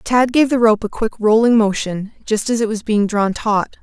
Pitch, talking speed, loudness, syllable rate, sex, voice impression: 220 Hz, 235 wpm, -16 LUFS, 4.7 syllables/s, female, feminine, slightly gender-neutral, slightly young, slightly adult-like, thin, tensed, powerful, bright, slightly hard, clear, fluent, slightly cute, cool, very intellectual, refreshing, sincere, calm, friendly, very reassuring, slightly unique, very elegant, sweet, slightly lively, very kind, modest